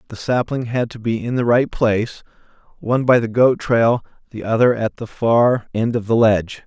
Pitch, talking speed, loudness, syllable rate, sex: 115 Hz, 200 wpm, -18 LUFS, 5.1 syllables/s, male